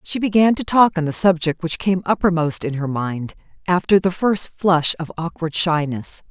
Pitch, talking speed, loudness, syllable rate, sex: 170 Hz, 190 wpm, -19 LUFS, 4.7 syllables/s, female